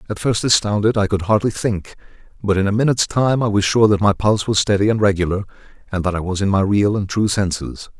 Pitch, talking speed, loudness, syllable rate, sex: 100 Hz, 240 wpm, -18 LUFS, 6.2 syllables/s, male